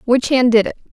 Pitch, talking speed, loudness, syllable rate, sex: 245 Hz, 250 wpm, -15 LUFS, 5.9 syllables/s, female